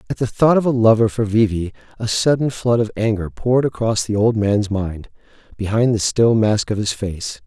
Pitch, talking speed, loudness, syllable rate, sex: 110 Hz, 215 wpm, -18 LUFS, 5.1 syllables/s, male